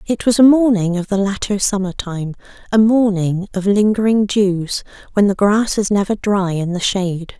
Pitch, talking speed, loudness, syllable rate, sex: 200 Hz, 185 wpm, -16 LUFS, 4.8 syllables/s, female